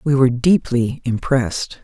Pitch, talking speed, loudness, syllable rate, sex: 125 Hz, 130 wpm, -18 LUFS, 4.7 syllables/s, female